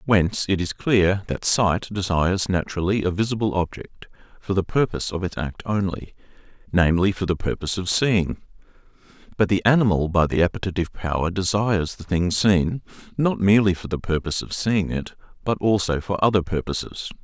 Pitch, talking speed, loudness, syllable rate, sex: 95 Hz, 165 wpm, -22 LUFS, 5.6 syllables/s, male